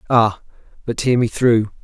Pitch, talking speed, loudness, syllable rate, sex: 115 Hz, 165 wpm, -18 LUFS, 4.5 syllables/s, male